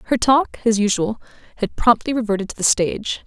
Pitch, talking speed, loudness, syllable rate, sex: 220 Hz, 185 wpm, -19 LUFS, 5.8 syllables/s, female